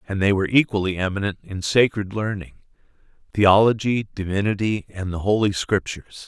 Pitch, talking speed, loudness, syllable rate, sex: 100 Hz, 125 wpm, -21 LUFS, 5.4 syllables/s, male